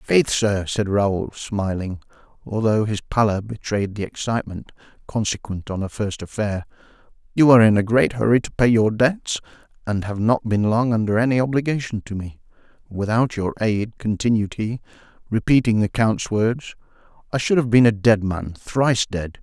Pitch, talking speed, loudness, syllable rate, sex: 110 Hz, 165 wpm, -21 LUFS, 4.9 syllables/s, male